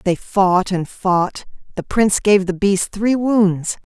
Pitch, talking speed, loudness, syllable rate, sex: 195 Hz, 165 wpm, -17 LUFS, 3.6 syllables/s, female